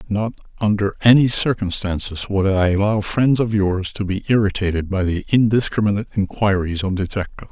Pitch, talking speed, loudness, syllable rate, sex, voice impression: 100 Hz, 150 wpm, -19 LUFS, 5.7 syllables/s, male, masculine, middle-aged, slightly thick, slightly weak, soft, muffled, slightly raspy, calm, mature, slightly friendly, reassuring, wild, slightly strict